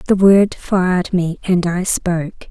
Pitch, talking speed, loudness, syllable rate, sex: 180 Hz, 170 wpm, -16 LUFS, 4.0 syllables/s, female